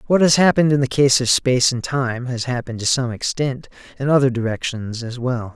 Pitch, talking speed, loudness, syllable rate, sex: 130 Hz, 215 wpm, -18 LUFS, 5.7 syllables/s, male